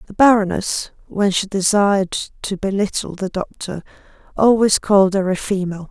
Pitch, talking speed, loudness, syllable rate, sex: 195 Hz, 150 wpm, -18 LUFS, 5.0 syllables/s, female